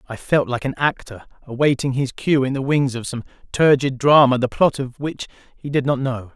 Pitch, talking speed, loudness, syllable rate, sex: 130 Hz, 215 wpm, -19 LUFS, 5.2 syllables/s, male